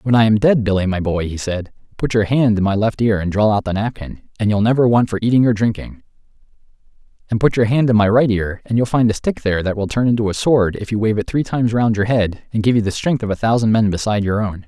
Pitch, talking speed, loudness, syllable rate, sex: 110 Hz, 285 wpm, -17 LUFS, 6.4 syllables/s, male